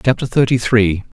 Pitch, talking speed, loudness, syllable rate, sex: 115 Hz, 150 wpm, -15 LUFS, 5.2 syllables/s, male